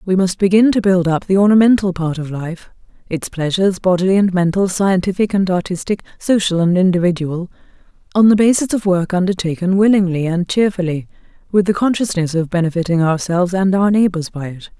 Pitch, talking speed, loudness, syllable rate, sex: 185 Hz, 160 wpm, -16 LUFS, 5.8 syllables/s, female